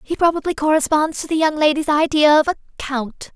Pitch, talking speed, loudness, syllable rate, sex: 305 Hz, 195 wpm, -17 LUFS, 5.7 syllables/s, female